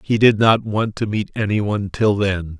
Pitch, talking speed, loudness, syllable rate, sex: 105 Hz, 210 wpm, -18 LUFS, 4.5 syllables/s, male